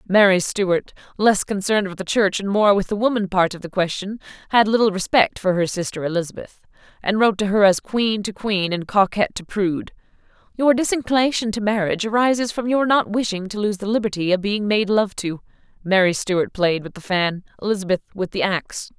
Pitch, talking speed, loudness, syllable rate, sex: 200 Hz, 200 wpm, -20 LUFS, 5.7 syllables/s, female